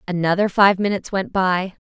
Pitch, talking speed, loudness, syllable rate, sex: 190 Hz, 160 wpm, -19 LUFS, 5.5 syllables/s, female